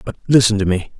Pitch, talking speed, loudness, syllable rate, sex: 105 Hz, 240 wpm, -15 LUFS, 6.9 syllables/s, male